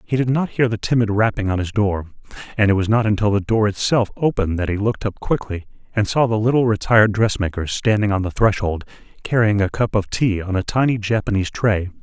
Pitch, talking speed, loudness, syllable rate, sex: 105 Hz, 220 wpm, -19 LUFS, 6.1 syllables/s, male